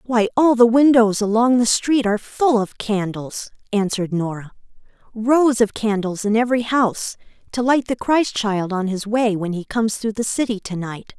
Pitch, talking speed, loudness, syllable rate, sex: 220 Hz, 190 wpm, -19 LUFS, 4.9 syllables/s, female